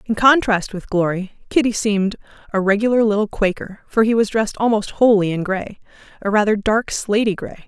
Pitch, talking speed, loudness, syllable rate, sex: 210 Hz, 180 wpm, -18 LUFS, 5.4 syllables/s, female